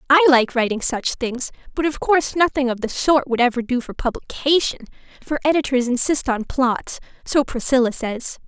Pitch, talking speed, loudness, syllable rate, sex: 260 Hz, 175 wpm, -20 LUFS, 5.1 syllables/s, female